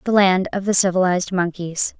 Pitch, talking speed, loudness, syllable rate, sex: 185 Hz, 180 wpm, -18 LUFS, 5.5 syllables/s, female